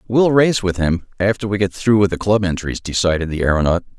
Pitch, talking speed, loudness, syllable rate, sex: 95 Hz, 225 wpm, -17 LUFS, 5.9 syllables/s, male